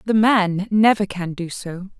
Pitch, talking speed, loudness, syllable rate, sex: 195 Hz, 180 wpm, -19 LUFS, 4.0 syllables/s, female